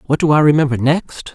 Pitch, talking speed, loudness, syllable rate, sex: 145 Hz, 225 wpm, -14 LUFS, 5.3 syllables/s, male